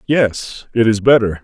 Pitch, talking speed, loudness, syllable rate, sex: 115 Hz, 165 wpm, -15 LUFS, 4.0 syllables/s, male